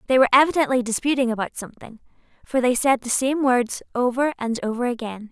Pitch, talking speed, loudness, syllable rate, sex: 250 Hz, 180 wpm, -21 LUFS, 6.3 syllables/s, female